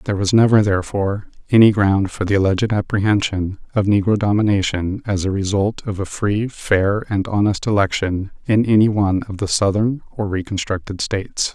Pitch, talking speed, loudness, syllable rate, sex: 100 Hz, 165 wpm, -18 LUFS, 5.4 syllables/s, male